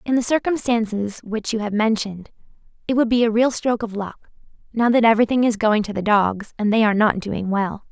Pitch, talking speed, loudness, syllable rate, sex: 220 Hz, 220 wpm, -20 LUFS, 5.9 syllables/s, female